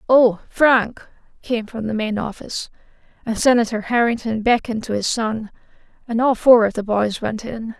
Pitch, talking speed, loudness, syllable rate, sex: 225 Hz, 170 wpm, -19 LUFS, 4.9 syllables/s, female